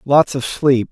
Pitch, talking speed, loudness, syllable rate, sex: 135 Hz, 195 wpm, -16 LUFS, 3.7 syllables/s, male